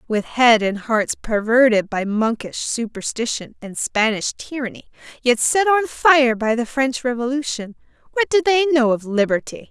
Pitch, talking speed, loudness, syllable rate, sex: 245 Hz, 155 wpm, -19 LUFS, 4.5 syllables/s, female